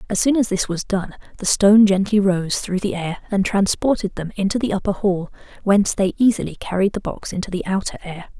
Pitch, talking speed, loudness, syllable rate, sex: 195 Hz, 215 wpm, -19 LUFS, 5.8 syllables/s, female